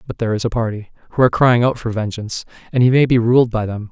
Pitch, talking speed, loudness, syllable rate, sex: 115 Hz, 275 wpm, -17 LUFS, 7.1 syllables/s, male